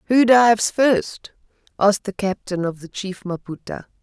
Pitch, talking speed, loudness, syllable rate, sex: 205 Hz, 150 wpm, -19 LUFS, 4.6 syllables/s, female